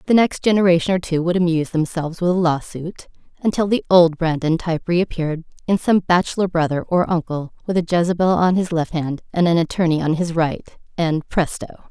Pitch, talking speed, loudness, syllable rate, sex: 170 Hz, 190 wpm, -19 LUFS, 6.0 syllables/s, female